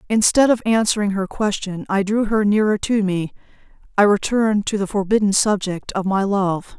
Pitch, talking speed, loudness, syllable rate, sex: 205 Hz, 170 wpm, -19 LUFS, 5.1 syllables/s, female